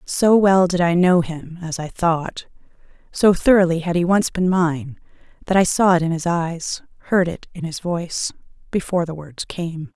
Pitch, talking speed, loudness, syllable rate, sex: 175 Hz, 195 wpm, -19 LUFS, 4.7 syllables/s, female